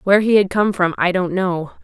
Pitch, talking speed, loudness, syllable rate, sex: 190 Hz, 260 wpm, -17 LUFS, 5.6 syllables/s, female